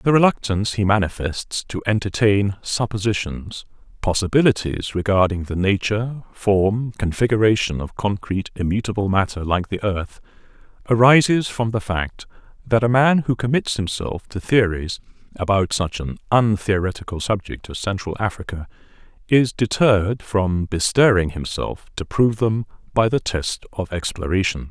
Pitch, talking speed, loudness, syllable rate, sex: 100 Hz, 130 wpm, -20 LUFS, 4.9 syllables/s, male